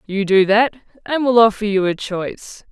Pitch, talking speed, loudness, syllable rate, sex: 210 Hz, 200 wpm, -16 LUFS, 4.7 syllables/s, female